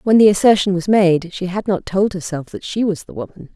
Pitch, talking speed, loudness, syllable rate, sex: 190 Hz, 255 wpm, -17 LUFS, 5.5 syllables/s, female